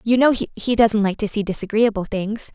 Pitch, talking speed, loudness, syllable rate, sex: 215 Hz, 210 wpm, -20 LUFS, 5.4 syllables/s, female